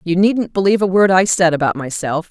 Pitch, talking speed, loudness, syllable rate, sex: 180 Hz, 235 wpm, -15 LUFS, 5.9 syllables/s, female